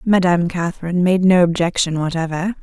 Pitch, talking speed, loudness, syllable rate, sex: 175 Hz, 115 wpm, -17 LUFS, 6.1 syllables/s, female